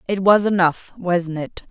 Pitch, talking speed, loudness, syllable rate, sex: 185 Hz, 175 wpm, -19 LUFS, 4.2 syllables/s, female